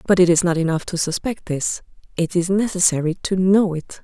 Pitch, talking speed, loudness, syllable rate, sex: 180 Hz, 210 wpm, -19 LUFS, 5.3 syllables/s, female